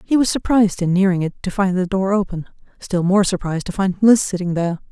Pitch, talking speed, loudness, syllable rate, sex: 190 Hz, 220 wpm, -18 LUFS, 6.1 syllables/s, female